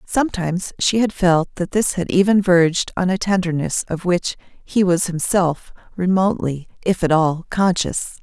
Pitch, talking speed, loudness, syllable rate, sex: 180 Hz, 160 wpm, -19 LUFS, 4.6 syllables/s, female